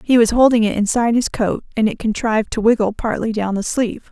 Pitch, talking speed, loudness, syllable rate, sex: 225 Hz, 235 wpm, -17 LUFS, 6.2 syllables/s, female